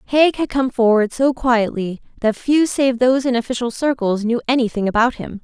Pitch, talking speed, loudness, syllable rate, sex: 245 Hz, 190 wpm, -18 LUFS, 5.2 syllables/s, female